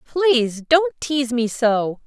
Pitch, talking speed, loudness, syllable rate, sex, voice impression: 260 Hz, 145 wpm, -19 LUFS, 3.7 syllables/s, female, feminine, adult-like, slightly powerful, intellectual, slightly intense